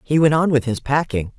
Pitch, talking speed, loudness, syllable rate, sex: 140 Hz, 260 wpm, -18 LUFS, 5.6 syllables/s, female